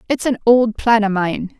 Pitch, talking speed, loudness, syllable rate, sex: 220 Hz, 225 wpm, -16 LUFS, 4.5 syllables/s, female